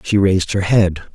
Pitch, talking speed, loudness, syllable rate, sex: 95 Hz, 210 wpm, -16 LUFS, 5.4 syllables/s, male